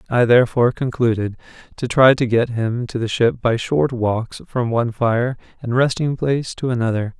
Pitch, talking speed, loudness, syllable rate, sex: 120 Hz, 185 wpm, -19 LUFS, 5.1 syllables/s, male